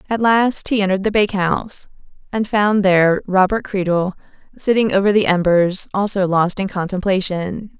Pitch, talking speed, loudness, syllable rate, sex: 195 Hz, 145 wpm, -17 LUFS, 5.1 syllables/s, female